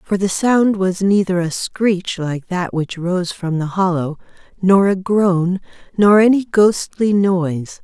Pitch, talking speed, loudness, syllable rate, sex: 185 Hz, 160 wpm, -16 LUFS, 3.8 syllables/s, female